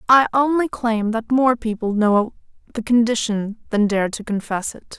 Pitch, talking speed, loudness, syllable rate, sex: 225 Hz, 170 wpm, -19 LUFS, 4.4 syllables/s, female